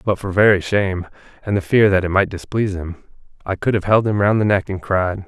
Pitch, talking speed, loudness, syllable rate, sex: 95 Hz, 250 wpm, -18 LUFS, 6.0 syllables/s, male